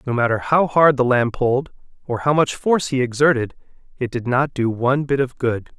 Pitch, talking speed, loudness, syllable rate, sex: 130 Hz, 220 wpm, -19 LUFS, 5.6 syllables/s, male